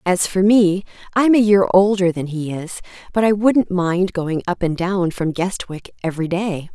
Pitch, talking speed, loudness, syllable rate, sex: 185 Hz, 195 wpm, -18 LUFS, 4.5 syllables/s, female